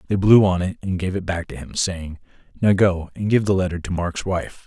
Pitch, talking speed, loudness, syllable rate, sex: 90 Hz, 255 wpm, -20 LUFS, 5.3 syllables/s, male